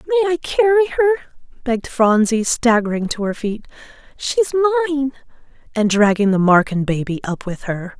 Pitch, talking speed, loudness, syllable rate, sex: 255 Hz, 135 wpm, -18 LUFS, 5.4 syllables/s, female